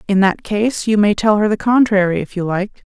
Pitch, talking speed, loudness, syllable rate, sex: 205 Hz, 250 wpm, -16 LUFS, 5.2 syllables/s, female